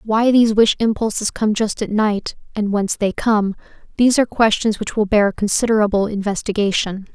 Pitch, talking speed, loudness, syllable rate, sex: 210 Hz, 160 wpm, -18 LUFS, 5.5 syllables/s, female